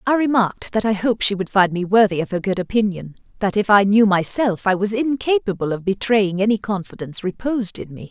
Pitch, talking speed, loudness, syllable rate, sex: 205 Hz, 215 wpm, -19 LUFS, 5.9 syllables/s, female